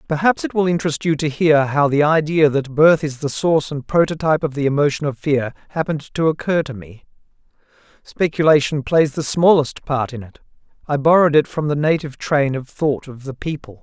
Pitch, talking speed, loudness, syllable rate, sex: 145 Hz, 200 wpm, -18 LUFS, 5.7 syllables/s, male